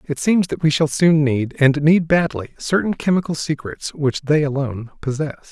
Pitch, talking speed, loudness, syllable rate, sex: 150 Hz, 185 wpm, -19 LUFS, 4.8 syllables/s, male